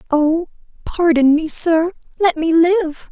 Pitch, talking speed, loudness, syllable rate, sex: 330 Hz, 135 wpm, -16 LUFS, 3.6 syllables/s, female